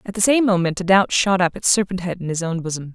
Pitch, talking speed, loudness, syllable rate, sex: 185 Hz, 305 wpm, -19 LUFS, 6.3 syllables/s, female